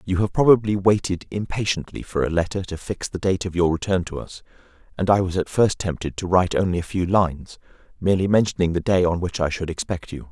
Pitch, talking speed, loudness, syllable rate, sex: 90 Hz, 225 wpm, -22 LUFS, 6.1 syllables/s, male